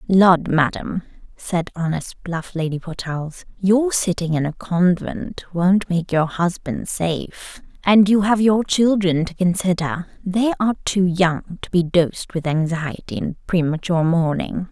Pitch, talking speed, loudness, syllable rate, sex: 180 Hz, 145 wpm, -20 LUFS, 4.3 syllables/s, female